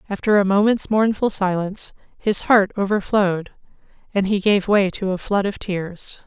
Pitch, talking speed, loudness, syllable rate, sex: 200 Hz, 165 wpm, -19 LUFS, 4.9 syllables/s, female